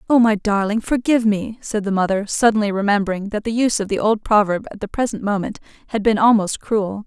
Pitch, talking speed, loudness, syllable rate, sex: 210 Hz, 210 wpm, -19 LUFS, 6.0 syllables/s, female